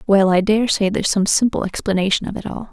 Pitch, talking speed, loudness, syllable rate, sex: 200 Hz, 220 wpm, -18 LUFS, 6.6 syllables/s, female